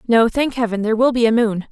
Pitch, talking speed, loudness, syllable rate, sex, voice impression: 230 Hz, 280 wpm, -17 LUFS, 6.5 syllables/s, female, very feminine, slightly adult-like, thin, slightly tensed, slightly weak, bright, soft, slightly muffled, fluent, slightly raspy, cute, intellectual, very refreshing, sincere, calm, very mature, friendly, reassuring, unique, elegant, slightly wild, sweet, lively, strict, intense, slightly sharp, modest, slightly light